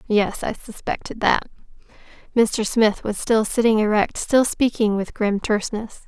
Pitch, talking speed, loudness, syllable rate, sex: 215 Hz, 150 wpm, -21 LUFS, 4.5 syllables/s, female